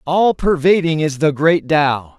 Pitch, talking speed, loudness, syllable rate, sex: 155 Hz, 165 wpm, -15 LUFS, 3.9 syllables/s, male